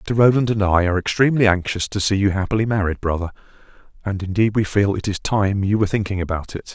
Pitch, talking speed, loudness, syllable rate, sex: 100 Hz, 220 wpm, -19 LUFS, 6.5 syllables/s, male